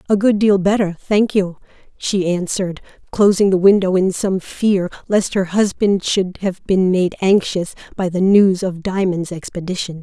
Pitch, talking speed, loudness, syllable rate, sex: 190 Hz, 170 wpm, -17 LUFS, 4.5 syllables/s, female